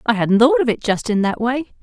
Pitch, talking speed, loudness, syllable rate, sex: 240 Hz, 295 wpm, -17 LUFS, 5.4 syllables/s, female